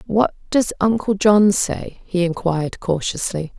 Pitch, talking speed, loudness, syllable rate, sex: 190 Hz, 135 wpm, -19 LUFS, 4.1 syllables/s, female